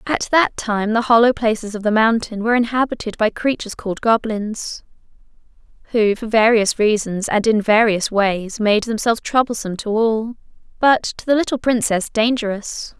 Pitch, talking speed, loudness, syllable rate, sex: 220 Hz, 155 wpm, -18 LUFS, 5.0 syllables/s, female